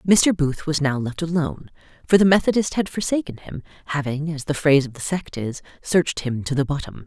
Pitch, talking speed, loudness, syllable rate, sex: 150 Hz, 210 wpm, -21 LUFS, 5.8 syllables/s, female